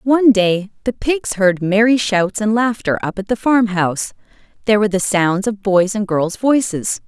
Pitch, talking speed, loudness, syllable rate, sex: 210 Hz, 185 wpm, -16 LUFS, 4.8 syllables/s, female